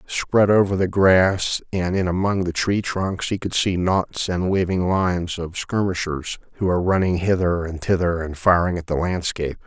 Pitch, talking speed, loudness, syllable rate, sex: 90 Hz, 185 wpm, -21 LUFS, 4.7 syllables/s, male